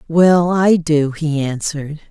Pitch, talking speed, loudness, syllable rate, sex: 160 Hz, 145 wpm, -15 LUFS, 3.8 syllables/s, female